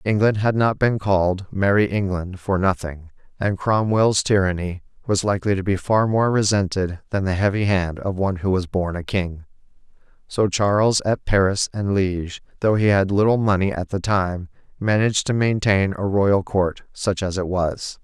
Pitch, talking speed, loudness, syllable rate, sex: 100 Hz, 180 wpm, -21 LUFS, 4.8 syllables/s, male